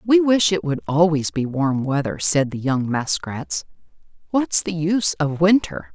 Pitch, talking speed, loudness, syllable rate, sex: 155 Hz, 170 wpm, -20 LUFS, 4.3 syllables/s, female